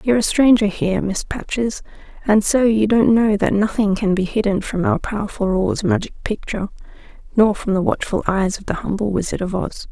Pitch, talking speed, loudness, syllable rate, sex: 210 Hz, 195 wpm, -19 LUFS, 5.6 syllables/s, female